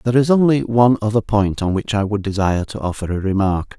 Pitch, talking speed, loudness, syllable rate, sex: 105 Hz, 240 wpm, -18 LUFS, 6.3 syllables/s, male